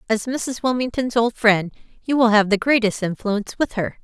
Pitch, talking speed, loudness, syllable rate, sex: 225 Hz, 195 wpm, -20 LUFS, 5.2 syllables/s, female